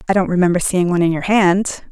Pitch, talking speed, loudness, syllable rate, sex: 180 Hz, 250 wpm, -16 LUFS, 6.4 syllables/s, female